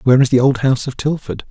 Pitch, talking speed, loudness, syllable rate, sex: 130 Hz, 280 wpm, -16 LUFS, 7.2 syllables/s, male